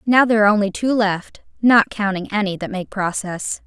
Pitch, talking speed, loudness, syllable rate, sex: 205 Hz, 180 wpm, -18 LUFS, 5.4 syllables/s, female